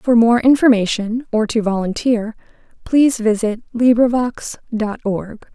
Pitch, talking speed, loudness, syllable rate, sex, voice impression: 230 Hz, 120 wpm, -16 LUFS, 4.3 syllables/s, female, feminine, slightly adult-like, slightly cute, calm, slightly friendly, slightly sweet